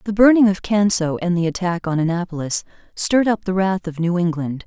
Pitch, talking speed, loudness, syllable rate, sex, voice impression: 185 Hz, 205 wpm, -19 LUFS, 5.7 syllables/s, female, very feminine, adult-like, slightly intellectual, slightly elegant